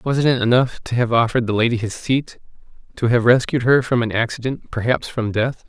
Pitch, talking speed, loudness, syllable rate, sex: 120 Hz, 210 wpm, -19 LUFS, 5.5 syllables/s, male